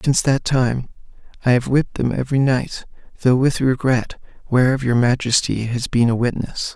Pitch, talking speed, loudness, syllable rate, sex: 125 Hz, 170 wpm, -19 LUFS, 5.2 syllables/s, male